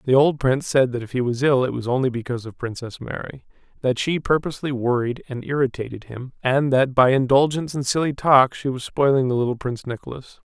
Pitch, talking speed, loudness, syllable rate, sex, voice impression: 130 Hz, 205 wpm, -21 LUFS, 5.9 syllables/s, male, masculine, adult-like, slightly thick, sincere, friendly